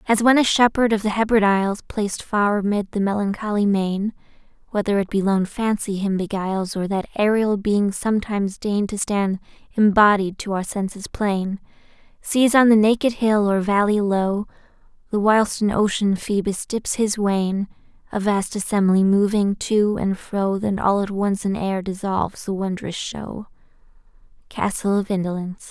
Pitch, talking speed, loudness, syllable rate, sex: 200 Hz, 165 wpm, -21 LUFS, 3.5 syllables/s, female